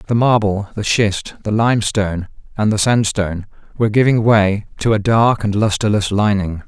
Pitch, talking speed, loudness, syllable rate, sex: 105 Hz, 160 wpm, -16 LUFS, 5.2 syllables/s, male